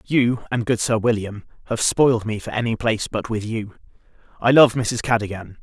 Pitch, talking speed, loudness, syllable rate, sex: 115 Hz, 190 wpm, -20 LUFS, 5.3 syllables/s, male